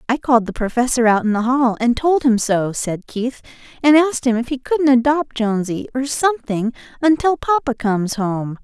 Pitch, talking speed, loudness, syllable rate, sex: 250 Hz, 195 wpm, -18 LUFS, 5.3 syllables/s, female